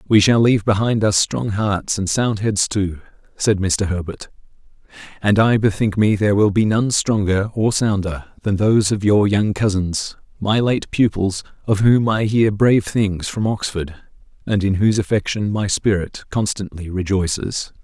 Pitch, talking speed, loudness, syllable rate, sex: 100 Hz, 170 wpm, -18 LUFS, 4.6 syllables/s, male